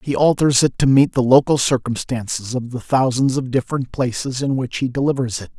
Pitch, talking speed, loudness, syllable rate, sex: 130 Hz, 205 wpm, -18 LUFS, 5.5 syllables/s, male